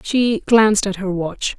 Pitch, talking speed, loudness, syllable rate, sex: 205 Hz, 190 wpm, -17 LUFS, 4.1 syllables/s, female